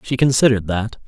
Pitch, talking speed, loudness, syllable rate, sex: 115 Hz, 170 wpm, -17 LUFS, 6.3 syllables/s, male